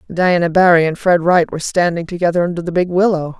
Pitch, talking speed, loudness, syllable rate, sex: 175 Hz, 210 wpm, -15 LUFS, 6.3 syllables/s, female